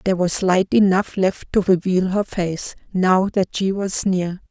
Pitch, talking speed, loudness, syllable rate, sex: 185 Hz, 185 wpm, -19 LUFS, 4.2 syllables/s, female